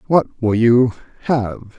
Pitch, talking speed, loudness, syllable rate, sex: 115 Hz, 135 wpm, -17 LUFS, 4.2 syllables/s, male